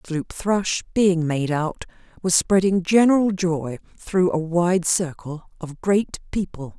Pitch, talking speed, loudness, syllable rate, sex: 175 Hz, 140 wpm, -21 LUFS, 3.7 syllables/s, female